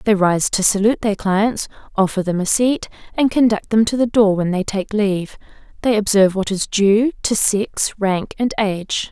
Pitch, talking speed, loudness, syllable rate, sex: 205 Hz, 200 wpm, -17 LUFS, 5.0 syllables/s, female